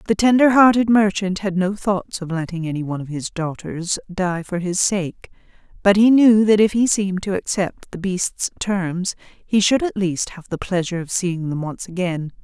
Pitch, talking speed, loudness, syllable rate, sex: 190 Hz, 205 wpm, -19 LUFS, 4.8 syllables/s, female